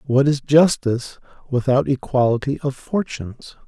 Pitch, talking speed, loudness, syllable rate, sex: 130 Hz, 115 wpm, -19 LUFS, 4.6 syllables/s, male